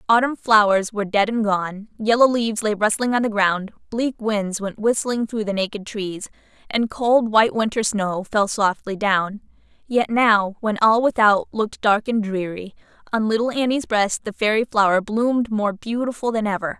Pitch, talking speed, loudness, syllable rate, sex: 215 Hz, 180 wpm, -20 LUFS, 4.8 syllables/s, female